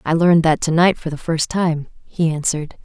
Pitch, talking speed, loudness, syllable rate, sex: 160 Hz, 210 wpm, -18 LUFS, 5.5 syllables/s, female